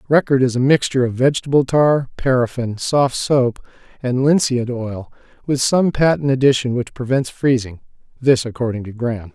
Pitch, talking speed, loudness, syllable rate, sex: 130 Hz, 150 wpm, -18 LUFS, 5.0 syllables/s, male